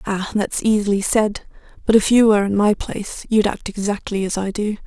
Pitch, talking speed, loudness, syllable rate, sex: 205 Hz, 210 wpm, -19 LUFS, 5.5 syllables/s, female